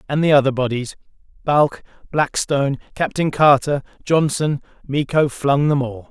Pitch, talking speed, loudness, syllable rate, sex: 140 Hz, 120 wpm, -19 LUFS, 4.7 syllables/s, male